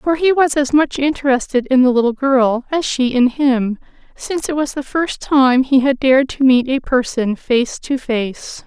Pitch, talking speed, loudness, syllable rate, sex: 265 Hz, 210 wpm, -16 LUFS, 4.5 syllables/s, female